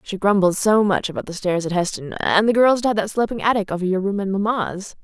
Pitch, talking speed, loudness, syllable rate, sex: 200 Hz, 275 wpm, -20 LUFS, 6.2 syllables/s, female